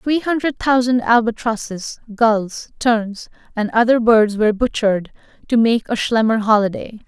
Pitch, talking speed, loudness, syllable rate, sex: 225 Hz, 135 wpm, -17 LUFS, 4.5 syllables/s, female